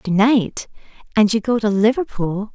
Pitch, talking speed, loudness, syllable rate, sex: 215 Hz, 165 wpm, -18 LUFS, 4.4 syllables/s, female